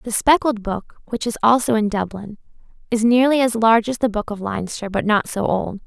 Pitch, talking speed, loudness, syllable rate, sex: 220 Hz, 215 wpm, -19 LUFS, 5.4 syllables/s, female